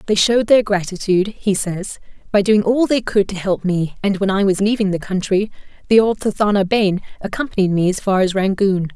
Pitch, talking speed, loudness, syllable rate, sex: 200 Hz, 210 wpm, -17 LUFS, 5.6 syllables/s, female